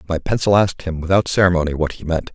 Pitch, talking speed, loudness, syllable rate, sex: 85 Hz, 230 wpm, -18 LUFS, 6.9 syllables/s, male